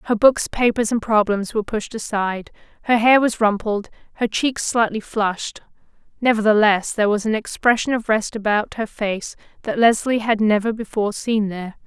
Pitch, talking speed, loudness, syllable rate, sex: 215 Hz, 165 wpm, -19 LUFS, 5.2 syllables/s, female